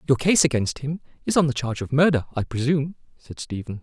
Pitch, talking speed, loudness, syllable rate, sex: 135 Hz, 220 wpm, -23 LUFS, 6.4 syllables/s, male